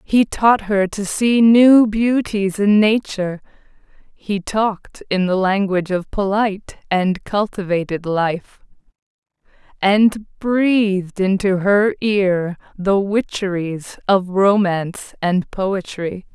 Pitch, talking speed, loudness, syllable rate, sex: 200 Hz, 110 wpm, -17 LUFS, 3.5 syllables/s, female